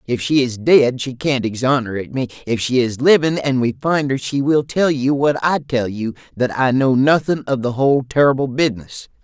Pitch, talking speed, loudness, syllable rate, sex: 130 Hz, 210 wpm, -17 LUFS, 5.2 syllables/s, male